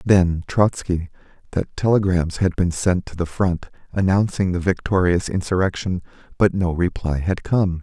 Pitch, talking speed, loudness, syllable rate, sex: 90 Hz, 145 wpm, -21 LUFS, 4.5 syllables/s, male